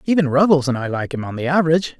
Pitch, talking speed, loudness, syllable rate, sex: 150 Hz, 270 wpm, -18 LUFS, 7.5 syllables/s, male